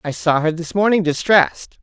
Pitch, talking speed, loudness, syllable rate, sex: 170 Hz, 195 wpm, -17 LUFS, 5.2 syllables/s, female